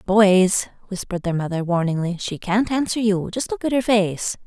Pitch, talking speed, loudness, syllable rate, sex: 200 Hz, 190 wpm, -21 LUFS, 5.0 syllables/s, female